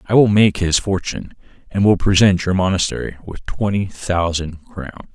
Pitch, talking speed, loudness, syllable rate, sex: 95 Hz, 165 wpm, -17 LUFS, 5.0 syllables/s, male